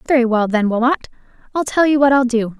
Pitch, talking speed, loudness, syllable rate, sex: 250 Hz, 230 wpm, -16 LUFS, 6.0 syllables/s, female